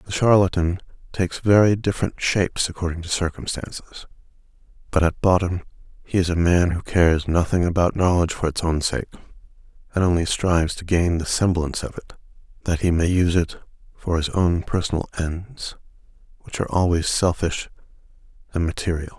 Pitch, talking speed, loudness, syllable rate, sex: 85 Hz, 155 wpm, -21 LUFS, 5.6 syllables/s, male